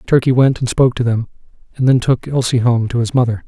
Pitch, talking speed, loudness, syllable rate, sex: 125 Hz, 240 wpm, -15 LUFS, 6.3 syllables/s, male